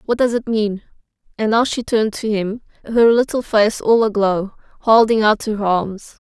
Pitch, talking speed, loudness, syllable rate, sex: 215 Hz, 180 wpm, -17 LUFS, 4.6 syllables/s, female